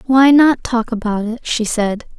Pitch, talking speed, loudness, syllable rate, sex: 235 Hz, 190 wpm, -15 LUFS, 4.2 syllables/s, female